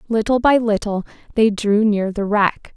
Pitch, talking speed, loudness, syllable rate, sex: 215 Hz, 175 wpm, -18 LUFS, 4.4 syllables/s, female